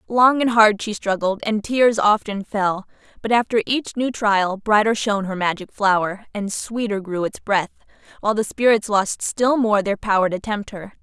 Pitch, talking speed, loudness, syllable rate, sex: 210 Hz, 190 wpm, -20 LUFS, 4.8 syllables/s, female